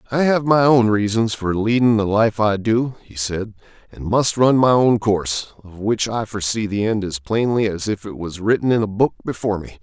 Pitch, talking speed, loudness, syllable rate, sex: 110 Hz, 225 wpm, -19 LUFS, 5.2 syllables/s, male